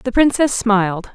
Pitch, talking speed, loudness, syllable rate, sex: 225 Hz, 160 wpm, -16 LUFS, 4.5 syllables/s, female